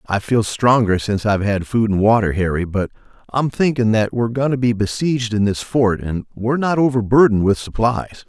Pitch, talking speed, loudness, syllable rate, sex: 110 Hz, 205 wpm, -18 LUFS, 5.6 syllables/s, male